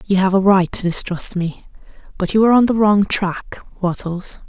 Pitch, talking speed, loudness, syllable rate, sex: 190 Hz, 200 wpm, -16 LUFS, 5.0 syllables/s, female